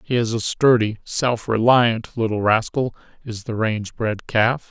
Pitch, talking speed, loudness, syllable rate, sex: 115 Hz, 165 wpm, -20 LUFS, 4.2 syllables/s, male